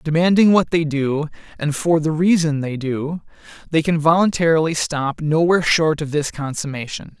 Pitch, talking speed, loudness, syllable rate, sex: 155 Hz, 160 wpm, -18 LUFS, 4.9 syllables/s, male